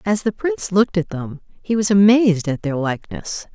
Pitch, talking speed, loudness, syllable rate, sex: 195 Hz, 205 wpm, -19 LUFS, 5.5 syllables/s, female